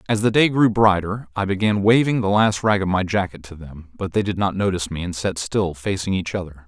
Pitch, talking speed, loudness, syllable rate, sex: 95 Hz, 250 wpm, -20 LUFS, 5.7 syllables/s, male